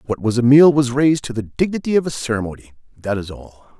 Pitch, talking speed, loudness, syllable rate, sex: 125 Hz, 235 wpm, -17 LUFS, 6.3 syllables/s, male